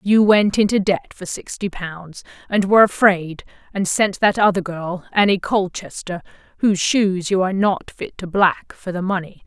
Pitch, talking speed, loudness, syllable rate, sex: 190 Hz, 180 wpm, -19 LUFS, 4.7 syllables/s, female